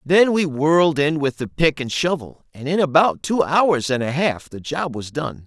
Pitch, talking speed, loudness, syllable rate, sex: 150 Hz, 230 wpm, -19 LUFS, 4.5 syllables/s, male